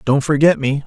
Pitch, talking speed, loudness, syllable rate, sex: 140 Hz, 210 wpm, -15 LUFS, 5.3 syllables/s, male